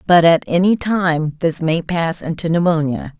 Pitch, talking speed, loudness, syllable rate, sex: 165 Hz, 170 wpm, -17 LUFS, 4.3 syllables/s, female